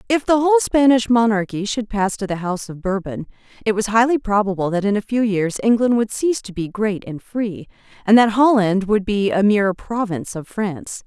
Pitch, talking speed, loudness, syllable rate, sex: 215 Hz, 210 wpm, -18 LUFS, 5.5 syllables/s, female